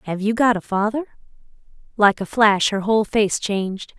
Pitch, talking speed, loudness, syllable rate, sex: 210 Hz, 180 wpm, -19 LUFS, 5.0 syllables/s, female